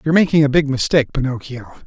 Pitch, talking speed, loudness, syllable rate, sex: 140 Hz, 225 wpm, -17 LUFS, 7.9 syllables/s, male